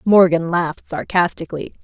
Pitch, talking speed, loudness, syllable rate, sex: 175 Hz, 100 wpm, -18 LUFS, 5.4 syllables/s, female